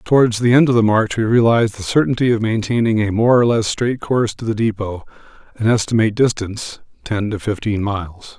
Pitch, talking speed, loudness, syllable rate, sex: 110 Hz, 200 wpm, -17 LUFS, 5.8 syllables/s, male